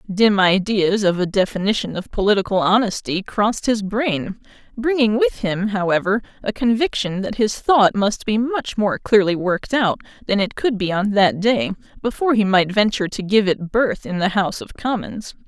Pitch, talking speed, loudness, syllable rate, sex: 205 Hz, 180 wpm, -19 LUFS, 5.1 syllables/s, female